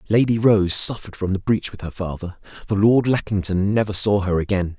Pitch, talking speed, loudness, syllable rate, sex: 100 Hz, 200 wpm, -20 LUFS, 5.5 syllables/s, male